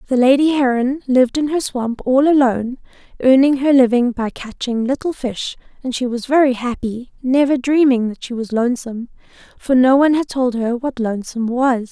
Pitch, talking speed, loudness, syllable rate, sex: 255 Hz, 180 wpm, -17 LUFS, 5.4 syllables/s, female